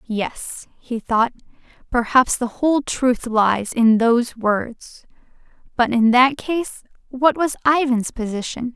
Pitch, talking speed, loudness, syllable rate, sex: 245 Hz, 130 wpm, -19 LUFS, 3.6 syllables/s, female